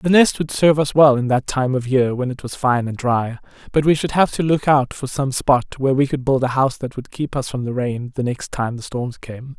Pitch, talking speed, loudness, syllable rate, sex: 135 Hz, 290 wpm, -19 LUFS, 5.4 syllables/s, male